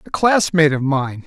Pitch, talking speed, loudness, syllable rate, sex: 155 Hz, 190 wpm, -16 LUFS, 5.2 syllables/s, male